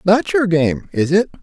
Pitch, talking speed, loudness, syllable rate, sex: 185 Hz, 210 wpm, -16 LUFS, 4.8 syllables/s, male